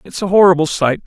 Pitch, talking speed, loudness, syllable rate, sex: 175 Hz, 225 wpm, -13 LUFS, 6.5 syllables/s, female